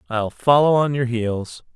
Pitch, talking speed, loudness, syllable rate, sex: 125 Hz, 170 wpm, -19 LUFS, 4.1 syllables/s, male